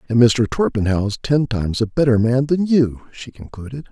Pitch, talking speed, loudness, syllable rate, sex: 120 Hz, 185 wpm, -18 LUFS, 5.0 syllables/s, male